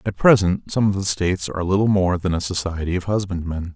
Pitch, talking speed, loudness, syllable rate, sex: 95 Hz, 225 wpm, -20 LUFS, 6.0 syllables/s, male